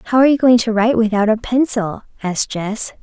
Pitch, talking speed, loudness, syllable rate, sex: 225 Hz, 220 wpm, -16 LUFS, 6.4 syllables/s, female